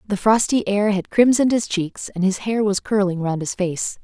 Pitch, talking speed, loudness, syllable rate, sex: 200 Hz, 225 wpm, -20 LUFS, 4.8 syllables/s, female